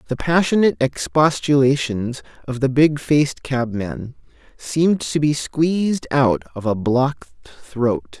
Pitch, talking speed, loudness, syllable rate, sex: 140 Hz, 125 wpm, -19 LUFS, 4.3 syllables/s, male